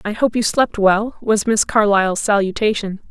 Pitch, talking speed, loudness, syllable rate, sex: 210 Hz, 175 wpm, -17 LUFS, 4.8 syllables/s, female